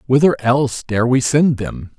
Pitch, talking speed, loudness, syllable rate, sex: 130 Hz, 180 wpm, -16 LUFS, 4.5 syllables/s, male